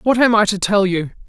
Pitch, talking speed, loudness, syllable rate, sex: 205 Hz, 280 wpm, -16 LUFS, 5.7 syllables/s, female